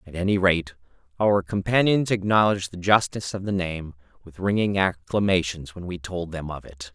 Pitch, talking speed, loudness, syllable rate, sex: 90 Hz, 175 wpm, -23 LUFS, 5.1 syllables/s, male